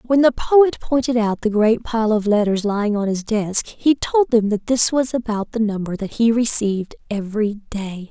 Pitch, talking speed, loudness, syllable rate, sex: 225 Hz, 205 wpm, -19 LUFS, 4.7 syllables/s, female